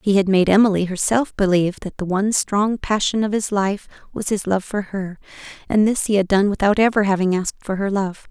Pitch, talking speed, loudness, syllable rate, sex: 200 Hz, 225 wpm, -19 LUFS, 5.7 syllables/s, female